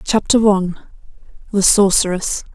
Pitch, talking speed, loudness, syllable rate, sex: 195 Hz, 95 wpm, -15 LUFS, 4.7 syllables/s, female